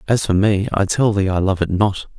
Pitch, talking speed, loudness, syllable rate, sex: 100 Hz, 275 wpm, -17 LUFS, 5.3 syllables/s, male